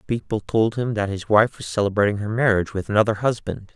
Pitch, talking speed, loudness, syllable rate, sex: 105 Hz, 210 wpm, -21 LUFS, 6.1 syllables/s, male